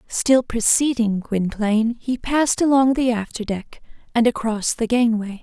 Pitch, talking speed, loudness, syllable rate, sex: 230 Hz, 145 wpm, -20 LUFS, 4.5 syllables/s, female